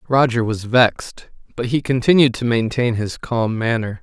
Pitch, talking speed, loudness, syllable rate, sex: 120 Hz, 165 wpm, -18 LUFS, 4.7 syllables/s, male